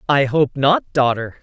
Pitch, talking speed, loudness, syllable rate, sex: 140 Hz, 170 wpm, -17 LUFS, 4.0 syllables/s, female